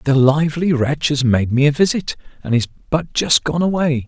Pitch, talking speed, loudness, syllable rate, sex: 145 Hz, 205 wpm, -17 LUFS, 4.8 syllables/s, male